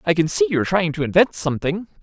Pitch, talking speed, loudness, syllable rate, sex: 160 Hz, 235 wpm, -19 LUFS, 6.8 syllables/s, male